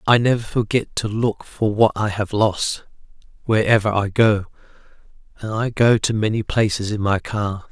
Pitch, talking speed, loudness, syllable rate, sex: 105 Hz, 170 wpm, -19 LUFS, 4.6 syllables/s, male